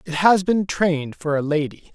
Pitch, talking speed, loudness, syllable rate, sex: 165 Hz, 215 wpm, -20 LUFS, 4.9 syllables/s, male